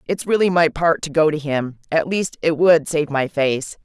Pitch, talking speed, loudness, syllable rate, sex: 155 Hz, 220 wpm, -18 LUFS, 4.5 syllables/s, female